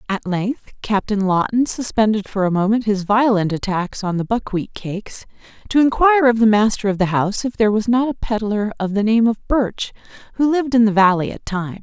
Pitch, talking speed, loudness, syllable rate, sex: 215 Hz, 210 wpm, -18 LUFS, 5.6 syllables/s, female